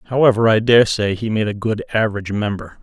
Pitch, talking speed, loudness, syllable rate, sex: 110 Hz, 210 wpm, -17 LUFS, 5.8 syllables/s, male